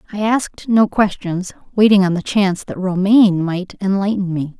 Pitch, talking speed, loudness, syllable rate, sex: 195 Hz, 155 wpm, -16 LUFS, 5.1 syllables/s, female